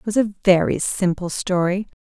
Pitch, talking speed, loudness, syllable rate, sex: 190 Hz, 175 wpm, -20 LUFS, 4.8 syllables/s, female